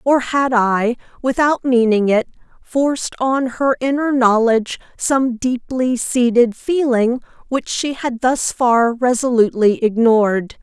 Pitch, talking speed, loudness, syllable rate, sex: 245 Hz, 125 wpm, -17 LUFS, 3.9 syllables/s, female